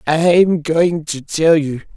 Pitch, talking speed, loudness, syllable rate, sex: 160 Hz, 185 wpm, -15 LUFS, 3.5 syllables/s, male